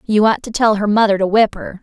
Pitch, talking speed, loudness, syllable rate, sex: 210 Hz, 295 wpm, -15 LUFS, 5.8 syllables/s, female